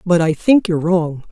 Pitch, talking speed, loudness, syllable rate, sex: 175 Hz, 230 wpm, -15 LUFS, 5.1 syllables/s, female